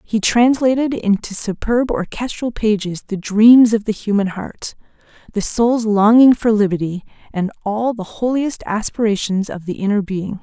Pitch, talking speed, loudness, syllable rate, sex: 215 Hz, 150 wpm, -17 LUFS, 4.5 syllables/s, female